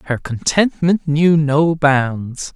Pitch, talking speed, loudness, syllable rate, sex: 150 Hz, 115 wpm, -16 LUFS, 3.0 syllables/s, male